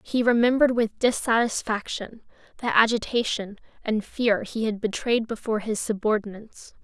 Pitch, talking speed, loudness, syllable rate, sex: 225 Hz, 125 wpm, -24 LUFS, 5.1 syllables/s, female